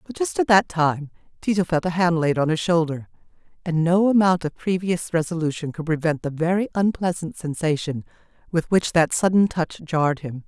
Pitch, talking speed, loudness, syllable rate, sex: 170 Hz, 185 wpm, -22 LUFS, 5.2 syllables/s, female